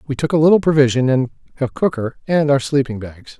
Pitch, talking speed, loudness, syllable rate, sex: 140 Hz, 210 wpm, -17 LUFS, 6.0 syllables/s, male